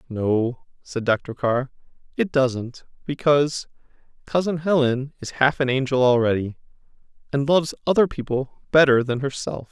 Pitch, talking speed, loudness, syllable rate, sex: 135 Hz, 130 wpm, -22 LUFS, 4.6 syllables/s, male